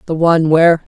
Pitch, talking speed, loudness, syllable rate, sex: 165 Hz, 190 wpm, -12 LUFS, 7.3 syllables/s, female